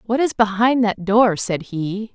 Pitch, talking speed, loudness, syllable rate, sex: 215 Hz, 195 wpm, -18 LUFS, 4.0 syllables/s, female